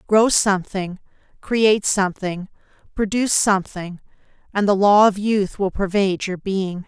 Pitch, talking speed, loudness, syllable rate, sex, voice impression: 195 Hz, 130 wpm, -19 LUFS, 4.8 syllables/s, female, feminine, middle-aged, slightly clear, slightly calm, unique